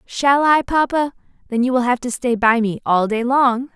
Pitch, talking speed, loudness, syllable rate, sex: 250 Hz, 210 wpm, -17 LUFS, 4.6 syllables/s, female